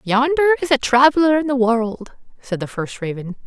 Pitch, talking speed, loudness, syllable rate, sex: 250 Hz, 190 wpm, -17 LUFS, 5.2 syllables/s, female